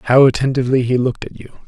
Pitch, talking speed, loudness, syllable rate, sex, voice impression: 125 Hz, 215 wpm, -15 LUFS, 6.9 syllables/s, male, masculine, adult-like, thick, cool, wild